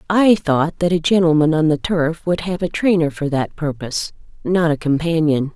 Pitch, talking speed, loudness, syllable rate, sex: 160 Hz, 185 wpm, -18 LUFS, 4.9 syllables/s, female